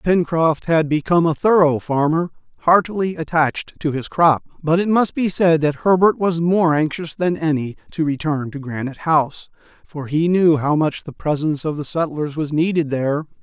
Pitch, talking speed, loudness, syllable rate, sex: 160 Hz, 185 wpm, -18 LUFS, 5.1 syllables/s, male